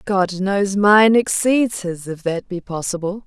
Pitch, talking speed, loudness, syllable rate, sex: 195 Hz, 165 wpm, -18 LUFS, 3.8 syllables/s, female